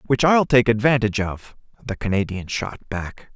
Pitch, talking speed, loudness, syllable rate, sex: 115 Hz, 160 wpm, -20 LUFS, 5.1 syllables/s, male